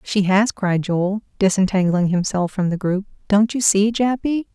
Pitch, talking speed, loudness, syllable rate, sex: 200 Hz, 170 wpm, -19 LUFS, 4.5 syllables/s, female